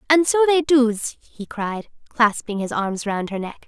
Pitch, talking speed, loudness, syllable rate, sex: 235 Hz, 195 wpm, -20 LUFS, 4.4 syllables/s, female